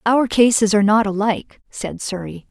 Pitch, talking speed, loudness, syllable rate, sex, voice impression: 215 Hz, 170 wpm, -17 LUFS, 5.3 syllables/s, female, feminine, adult-like, slightly sincere, friendly, slightly elegant, slightly sweet